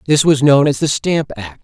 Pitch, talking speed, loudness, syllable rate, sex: 135 Hz, 255 wpm, -14 LUFS, 4.8 syllables/s, male